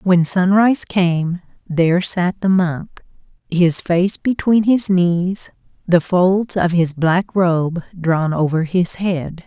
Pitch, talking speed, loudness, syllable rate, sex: 175 Hz, 140 wpm, -17 LUFS, 3.3 syllables/s, female